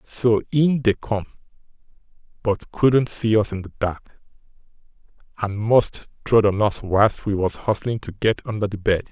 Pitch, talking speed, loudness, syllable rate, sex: 110 Hz, 165 wpm, -21 LUFS, 4.3 syllables/s, male